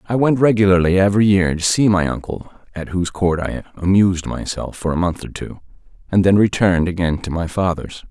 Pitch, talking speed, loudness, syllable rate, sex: 95 Hz, 200 wpm, -17 LUFS, 5.8 syllables/s, male